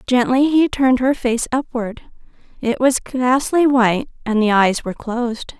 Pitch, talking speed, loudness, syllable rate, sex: 250 Hz, 160 wpm, -17 LUFS, 4.7 syllables/s, female